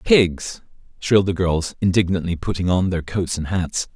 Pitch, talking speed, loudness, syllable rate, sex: 90 Hz, 165 wpm, -20 LUFS, 4.7 syllables/s, male